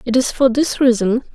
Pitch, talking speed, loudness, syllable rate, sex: 245 Hz, 220 wpm, -16 LUFS, 5.1 syllables/s, female